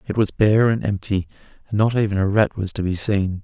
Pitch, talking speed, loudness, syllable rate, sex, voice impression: 100 Hz, 245 wpm, -20 LUFS, 5.6 syllables/s, male, masculine, adult-like, slightly relaxed, soft, slightly fluent, intellectual, sincere, friendly, reassuring, lively, kind, slightly modest